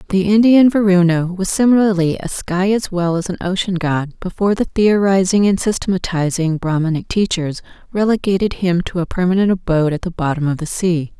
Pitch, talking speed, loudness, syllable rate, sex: 185 Hz, 170 wpm, -16 LUFS, 5.5 syllables/s, female